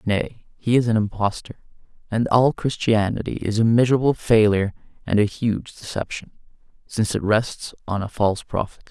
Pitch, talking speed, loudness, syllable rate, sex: 110 Hz, 155 wpm, -21 LUFS, 5.3 syllables/s, male